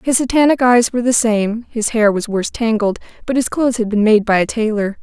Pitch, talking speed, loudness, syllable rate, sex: 225 Hz, 240 wpm, -15 LUFS, 5.8 syllables/s, female